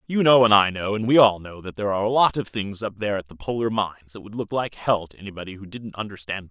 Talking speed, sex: 315 wpm, male